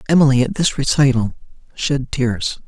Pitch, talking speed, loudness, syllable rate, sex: 130 Hz, 135 wpm, -17 LUFS, 4.7 syllables/s, male